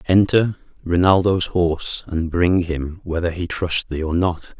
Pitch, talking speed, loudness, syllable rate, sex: 85 Hz, 155 wpm, -20 LUFS, 4.2 syllables/s, male